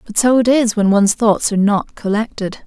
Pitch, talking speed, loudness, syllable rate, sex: 215 Hz, 225 wpm, -15 LUFS, 5.5 syllables/s, female